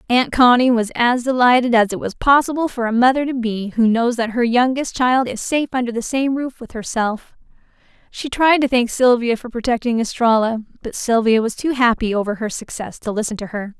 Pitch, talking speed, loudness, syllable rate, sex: 240 Hz, 210 wpm, -18 LUFS, 5.4 syllables/s, female